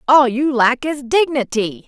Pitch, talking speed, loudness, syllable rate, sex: 260 Hz, 160 wpm, -16 LUFS, 4.1 syllables/s, female